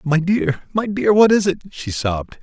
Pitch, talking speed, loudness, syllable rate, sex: 175 Hz, 225 wpm, -18 LUFS, 4.5 syllables/s, male